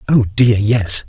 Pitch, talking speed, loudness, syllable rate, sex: 110 Hz, 165 wpm, -14 LUFS, 3.4 syllables/s, male